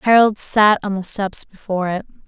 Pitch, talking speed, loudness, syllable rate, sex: 200 Hz, 185 wpm, -18 LUFS, 5.2 syllables/s, female